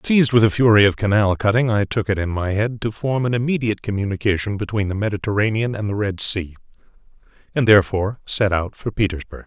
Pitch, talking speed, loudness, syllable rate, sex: 105 Hz, 195 wpm, -19 LUFS, 6.2 syllables/s, male